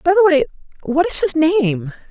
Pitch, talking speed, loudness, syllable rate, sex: 300 Hz, 200 wpm, -16 LUFS, 5.0 syllables/s, female